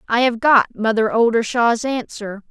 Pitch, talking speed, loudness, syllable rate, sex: 230 Hz, 145 wpm, -17 LUFS, 4.3 syllables/s, female